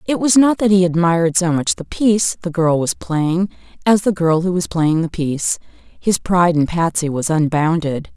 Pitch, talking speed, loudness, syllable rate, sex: 175 Hz, 205 wpm, -17 LUFS, 4.9 syllables/s, female